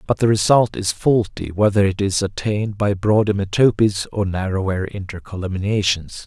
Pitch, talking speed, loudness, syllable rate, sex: 100 Hz, 145 wpm, -19 LUFS, 4.9 syllables/s, male